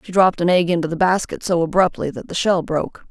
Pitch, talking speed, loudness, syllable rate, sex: 175 Hz, 250 wpm, -19 LUFS, 6.5 syllables/s, female